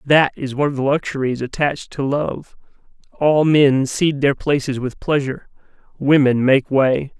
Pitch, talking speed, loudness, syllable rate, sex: 140 Hz, 160 wpm, -18 LUFS, 4.9 syllables/s, male